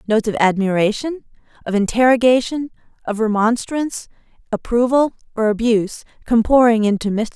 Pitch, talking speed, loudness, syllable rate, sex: 230 Hz, 115 wpm, -17 LUFS, 6.6 syllables/s, female